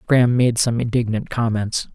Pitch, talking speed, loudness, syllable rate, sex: 115 Hz, 155 wpm, -19 LUFS, 5.1 syllables/s, male